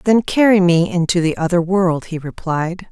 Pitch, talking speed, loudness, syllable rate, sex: 180 Hz, 185 wpm, -16 LUFS, 4.7 syllables/s, female